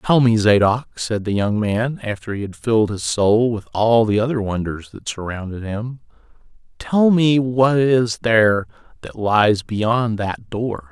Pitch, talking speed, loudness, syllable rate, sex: 115 Hz, 165 wpm, -18 LUFS, 4.1 syllables/s, male